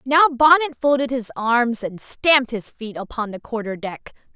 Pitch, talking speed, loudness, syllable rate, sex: 245 Hz, 180 wpm, -19 LUFS, 4.5 syllables/s, female